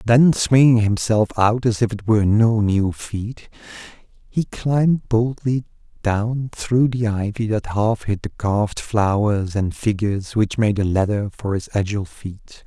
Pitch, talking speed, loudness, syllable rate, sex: 110 Hz, 160 wpm, -19 LUFS, 4.2 syllables/s, male